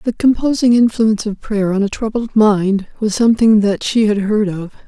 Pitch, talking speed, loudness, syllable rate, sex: 215 Hz, 195 wpm, -15 LUFS, 5.1 syllables/s, female